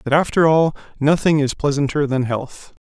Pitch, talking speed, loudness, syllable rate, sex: 145 Hz, 170 wpm, -18 LUFS, 4.9 syllables/s, male